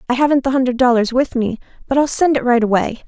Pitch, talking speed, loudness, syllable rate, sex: 250 Hz, 255 wpm, -16 LUFS, 6.6 syllables/s, female